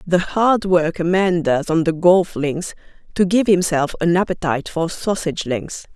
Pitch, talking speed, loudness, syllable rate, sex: 175 Hz, 180 wpm, -18 LUFS, 4.5 syllables/s, female